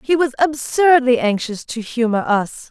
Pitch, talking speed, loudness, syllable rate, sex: 255 Hz, 155 wpm, -17 LUFS, 4.3 syllables/s, female